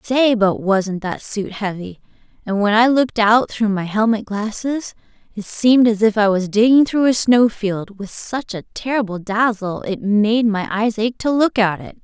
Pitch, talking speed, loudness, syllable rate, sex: 220 Hz, 200 wpm, -17 LUFS, 4.5 syllables/s, female